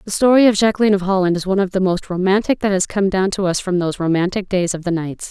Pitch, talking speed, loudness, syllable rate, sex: 190 Hz, 285 wpm, -17 LUFS, 6.9 syllables/s, female